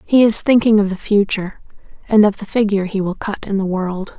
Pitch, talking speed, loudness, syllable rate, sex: 205 Hz, 230 wpm, -16 LUFS, 5.8 syllables/s, female